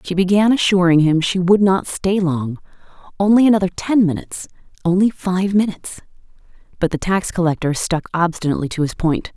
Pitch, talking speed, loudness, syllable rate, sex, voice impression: 180 Hz, 160 wpm, -17 LUFS, 5.7 syllables/s, female, feminine, adult-like, tensed, powerful, clear, fluent, intellectual, calm, elegant, lively, slightly strict, sharp